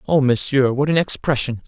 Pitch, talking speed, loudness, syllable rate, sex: 135 Hz, 180 wpm, -17 LUFS, 5.3 syllables/s, male